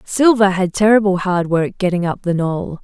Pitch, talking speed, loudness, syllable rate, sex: 190 Hz, 190 wpm, -16 LUFS, 4.8 syllables/s, female